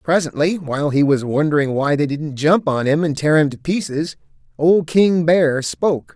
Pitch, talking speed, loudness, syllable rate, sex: 155 Hz, 195 wpm, -17 LUFS, 4.8 syllables/s, male